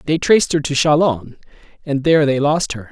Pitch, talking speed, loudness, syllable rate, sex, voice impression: 145 Hz, 205 wpm, -16 LUFS, 5.7 syllables/s, male, masculine, very adult-like, slightly soft, sincere, calm, kind